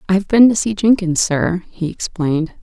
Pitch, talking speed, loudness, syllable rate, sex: 185 Hz, 205 wpm, -16 LUFS, 5.0 syllables/s, female